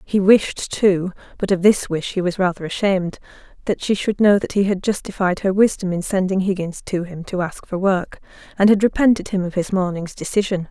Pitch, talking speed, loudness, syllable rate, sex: 190 Hz, 215 wpm, -19 LUFS, 5.4 syllables/s, female